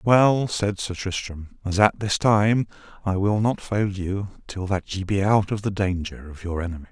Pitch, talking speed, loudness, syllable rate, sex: 100 Hz, 210 wpm, -23 LUFS, 4.5 syllables/s, male